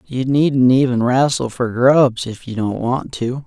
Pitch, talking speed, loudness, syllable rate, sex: 125 Hz, 190 wpm, -16 LUFS, 3.9 syllables/s, male